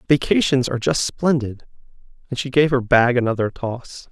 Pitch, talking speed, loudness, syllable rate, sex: 130 Hz, 160 wpm, -19 LUFS, 5.1 syllables/s, male